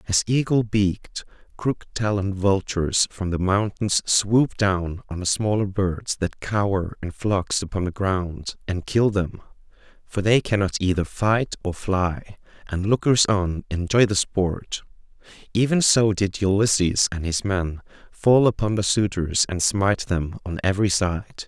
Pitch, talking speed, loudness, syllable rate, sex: 100 Hz, 150 wpm, -22 LUFS, 4.2 syllables/s, male